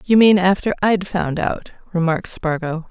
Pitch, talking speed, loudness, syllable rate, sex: 180 Hz, 165 wpm, -18 LUFS, 4.8 syllables/s, female